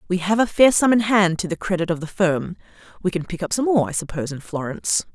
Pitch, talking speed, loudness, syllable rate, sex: 185 Hz, 270 wpm, -20 LUFS, 6.3 syllables/s, female